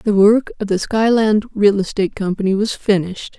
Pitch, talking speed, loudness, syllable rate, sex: 205 Hz, 175 wpm, -16 LUFS, 5.4 syllables/s, female